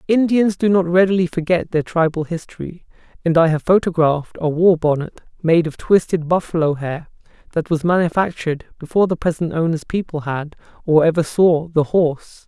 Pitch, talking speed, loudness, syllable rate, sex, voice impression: 165 Hz, 165 wpm, -18 LUFS, 5.5 syllables/s, male, masculine, adult-like, thin, weak, slightly bright, slightly halting, refreshing, calm, friendly, reassuring, kind, modest